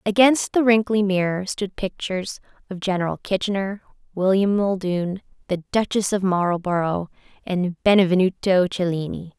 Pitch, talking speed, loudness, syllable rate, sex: 190 Hz, 115 wpm, -21 LUFS, 4.6 syllables/s, female